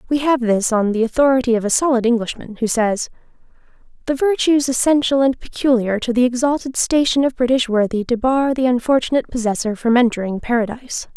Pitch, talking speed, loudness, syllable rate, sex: 245 Hz, 165 wpm, -17 LUFS, 6.0 syllables/s, female